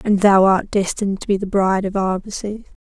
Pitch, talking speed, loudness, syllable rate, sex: 195 Hz, 210 wpm, -18 LUFS, 5.9 syllables/s, female